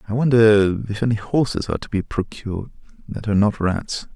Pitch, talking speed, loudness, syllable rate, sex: 105 Hz, 190 wpm, -20 LUFS, 5.7 syllables/s, male